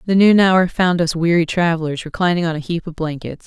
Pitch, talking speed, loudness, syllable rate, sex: 170 Hz, 225 wpm, -17 LUFS, 5.8 syllables/s, female